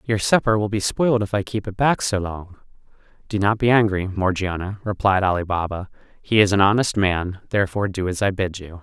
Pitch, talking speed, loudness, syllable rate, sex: 100 Hz, 210 wpm, -21 LUFS, 5.7 syllables/s, male